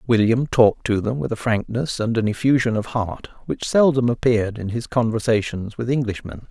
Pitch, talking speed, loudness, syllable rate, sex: 115 Hz, 185 wpm, -21 LUFS, 5.3 syllables/s, male